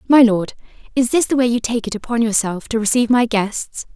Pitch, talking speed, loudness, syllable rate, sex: 230 Hz, 230 wpm, -17 LUFS, 5.7 syllables/s, female